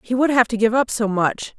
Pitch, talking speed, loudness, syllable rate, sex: 230 Hz, 305 wpm, -19 LUFS, 5.5 syllables/s, female